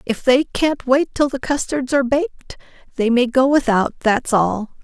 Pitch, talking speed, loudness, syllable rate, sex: 260 Hz, 175 wpm, -18 LUFS, 4.4 syllables/s, female